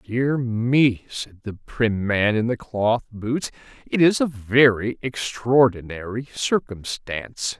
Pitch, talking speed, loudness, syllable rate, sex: 115 Hz, 125 wpm, -22 LUFS, 3.4 syllables/s, male